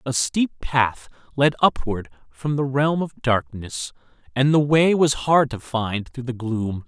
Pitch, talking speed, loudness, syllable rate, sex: 130 Hz, 175 wpm, -21 LUFS, 3.9 syllables/s, male